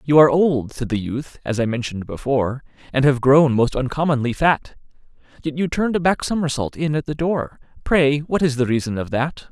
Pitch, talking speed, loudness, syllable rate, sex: 140 Hz, 210 wpm, -20 LUFS, 5.5 syllables/s, male